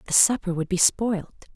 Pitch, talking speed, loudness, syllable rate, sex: 190 Hz, 195 wpm, -22 LUFS, 5.4 syllables/s, female